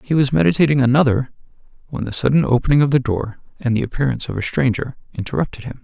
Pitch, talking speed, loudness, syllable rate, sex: 130 Hz, 195 wpm, -18 LUFS, 7.0 syllables/s, male